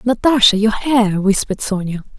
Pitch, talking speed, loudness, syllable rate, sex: 215 Hz, 140 wpm, -15 LUFS, 5.1 syllables/s, female